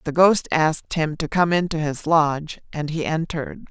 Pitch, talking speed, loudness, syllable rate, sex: 160 Hz, 195 wpm, -21 LUFS, 4.9 syllables/s, female